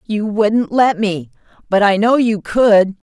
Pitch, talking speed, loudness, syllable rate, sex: 210 Hz, 175 wpm, -14 LUFS, 3.6 syllables/s, female